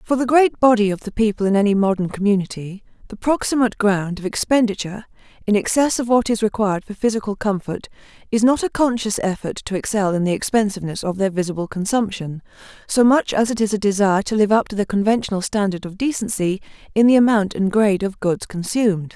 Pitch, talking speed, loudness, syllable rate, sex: 210 Hz, 195 wpm, -19 LUFS, 6.2 syllables/s, female